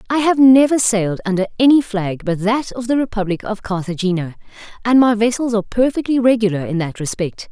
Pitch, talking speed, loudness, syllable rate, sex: 215 Hz, 185 wpm, -16 LUFS, 5.9 syllables/s, female